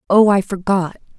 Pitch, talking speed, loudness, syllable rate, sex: 190 Hz, 150 wpm, -16 LUFS, 4.7 syllables/s, female